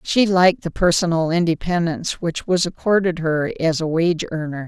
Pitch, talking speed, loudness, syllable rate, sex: 170 Hz, 165 wpm, -19 LUFS, 5.2 syllables/s, female